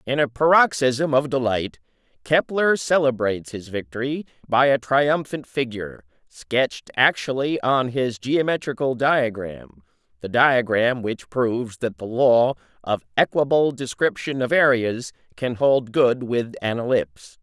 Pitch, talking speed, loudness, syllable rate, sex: 130 Hz, 125 wpm, -21 LUFS, 4.3 syllables/s, male